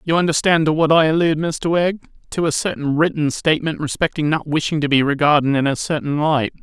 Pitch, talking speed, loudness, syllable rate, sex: 155 Hz, 210 wpm, -18 LUFS, 5.9 syllables/s, male